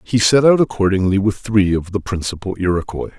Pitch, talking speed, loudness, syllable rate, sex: 100 Hz, 190 wpm, -17 LUFS, 5.6 syllables/s, male